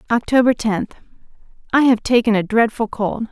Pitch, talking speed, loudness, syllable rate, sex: 230 Hz, 125 wpm, -17 LUFS, 5.1 syllables/s, female